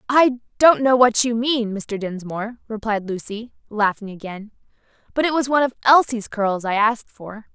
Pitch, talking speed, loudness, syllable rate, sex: 225 Hz, 175 wpm, -19 LUFS, 5.1 syllables/s, female